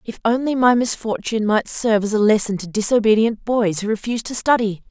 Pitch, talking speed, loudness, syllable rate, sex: 220 Hz, 195 wpm, -18 LUFS, 5.9 syllables/s, female